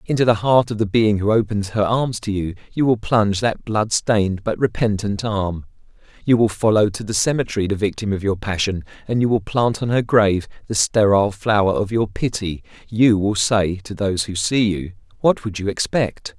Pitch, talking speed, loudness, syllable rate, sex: 105 Hz, 210 wpm, -19 LUFS, 5.2 syllables/s, male